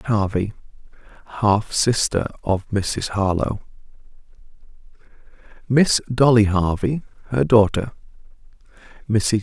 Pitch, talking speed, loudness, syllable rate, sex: 110 Hz, 75 wpm, -20 LUFS, 4.0 syllables/s, male